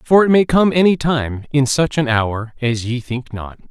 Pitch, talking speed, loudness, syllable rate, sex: 135 Hz, 225 wpm, -16 LUFS, 4.4 syllables/s, male